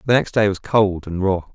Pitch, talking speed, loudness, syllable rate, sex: 100 Hz, 270 wpm, -19 LUFS, 5.3 syllables/s, male